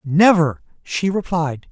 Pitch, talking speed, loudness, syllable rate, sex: 170 Hz, 105 wpm, -18 LUFS, 3.6 syllables/s, male